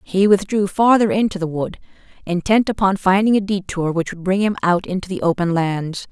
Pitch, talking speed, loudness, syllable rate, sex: 190 Hz, 195 wpm, -18 LUFS, 5.3 syllables/s, female